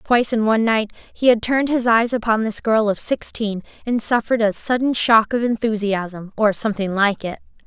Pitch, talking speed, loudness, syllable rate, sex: 220 Hz, 195 wpm, -19 LUFS, 5.3 syllables/s, female